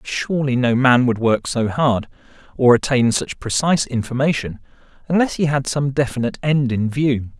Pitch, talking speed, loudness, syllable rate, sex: 130 Hz, 160 wpm, -18 LUFS, 5.1 syllables/s, male